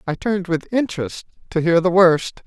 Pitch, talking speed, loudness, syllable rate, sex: 180 Hz, 195 wpm, -19 LUFS, 5.3 syllables/s, male